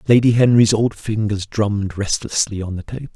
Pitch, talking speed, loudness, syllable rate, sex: 105 Hz, 170 wpm, -18 LUFS, 5.5 syllables/s, male